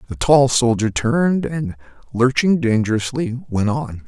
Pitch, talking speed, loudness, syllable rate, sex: 125 Hz, 135 wpm, -18 LUFS, 4.4 syllables/s, male